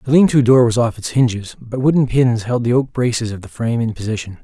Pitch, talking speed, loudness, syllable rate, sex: 120 Hz, 270 wpm, -16 LUFS, 6.1 syllables/s, male